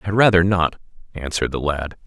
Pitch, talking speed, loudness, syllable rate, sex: 85 Hz, 205 wpm, -19 LUFS, 6.1 syllables/s, male